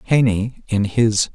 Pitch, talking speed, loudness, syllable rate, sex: 110 Hz, 135 wpm, -18 LUFS, 3.4 syllables/s, male